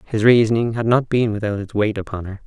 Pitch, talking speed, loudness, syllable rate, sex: 110 Hz, 245 wpm, -18 LUFS, 5.9 syllables/s, male